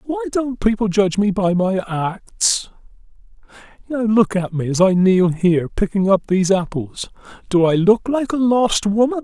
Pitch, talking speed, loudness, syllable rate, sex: 195 Hz, 170 wpm, -17 LUFS, 4.5 syllables/s, male